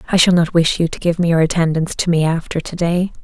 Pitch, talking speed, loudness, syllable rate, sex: 170 Hz, 260 wpm, -16 LUFS, 6.2 syllables/s, female